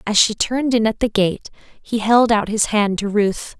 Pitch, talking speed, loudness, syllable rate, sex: 215 Hz, 235 wpm, -18 LUFS, 4.5 syllables/s, female